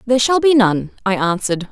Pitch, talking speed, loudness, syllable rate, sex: 225 Hz, 210 wpm, -16 LUFS, 6.2 syllables/s, female